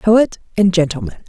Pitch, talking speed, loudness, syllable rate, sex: 190 Hz, 140 wpm, -16 LUFS, 5.1 syllables/s, female